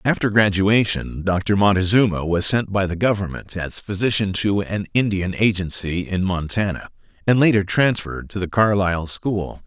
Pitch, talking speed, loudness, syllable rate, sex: 100 Hz, 150 wpm, -20 LUFS, 4.8 syllables/s, male